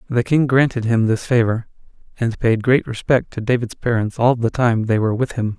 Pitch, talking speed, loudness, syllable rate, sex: 120 Hz, 215 wpm, -18 LUFS, 5.3 syllables/s, male